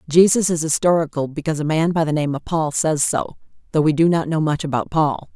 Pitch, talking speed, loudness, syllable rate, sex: 155 Hz, 235 wpm, -19 LUFS, 5.9 syllables/s, female